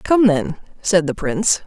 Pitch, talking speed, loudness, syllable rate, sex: 190 Hz, 180 wpm, -18 LUFS, 4.5 syllables/s, female